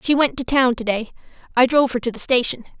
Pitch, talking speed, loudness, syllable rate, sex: 250 Hz, 215 wpm, -19 LUFS, 6.7 syllables/s, female